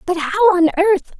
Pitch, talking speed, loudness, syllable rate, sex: 370 Hz, 200 wpm, -15 LUFS, 6.4 syllables/s, female